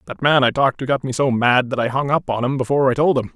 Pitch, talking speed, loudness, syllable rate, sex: 130 Hz, 340 wpm, -18 LUFS, 6.9 syllables/s, male